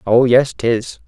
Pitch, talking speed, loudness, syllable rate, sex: 115 Hz, 165 wpm, -15 LUFS, 3.3 syllables/s, male